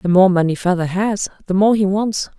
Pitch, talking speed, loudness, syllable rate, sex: 190 Hz, 225 wpm, -17 LUFS, 5.3 syllables/s, female